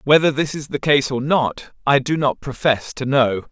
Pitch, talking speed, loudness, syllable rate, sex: 140 Hz, 220 wpm, -19 LUFS, 4.6 syllables/s, male